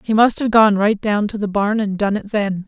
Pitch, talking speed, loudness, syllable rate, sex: 210 Hz, 290 wpm, -17 LUFS, 5.1 syllables/s, female